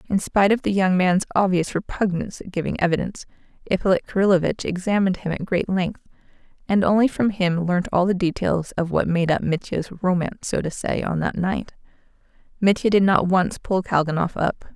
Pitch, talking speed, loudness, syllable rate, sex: 185 Hz, 185 wpm, -21 LUFS, 5.6 syllables/s, female